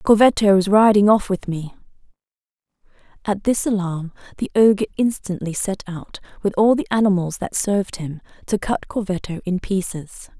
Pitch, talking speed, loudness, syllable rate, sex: 195 Hz, 150 wpm, -19 LUFS, 5.1 syllables/s, female